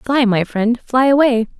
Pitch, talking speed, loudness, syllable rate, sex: 240 Hz, 190 wpm, -15 LUFS, 4.4 syllables/s, female